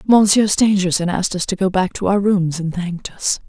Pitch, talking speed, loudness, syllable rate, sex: 185 Hz, 225 wpm, -17 LUFS, 5.5 syllables/s, female